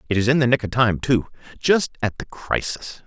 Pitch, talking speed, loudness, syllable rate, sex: 120 Hz, 235 wpm, -21 LUFS, 5.3 syllables/s, male